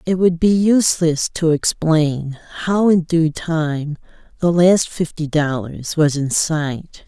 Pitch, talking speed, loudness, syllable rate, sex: 160 Hz, 145 wpm, -17 LUFS, 3.5 syllables/s, female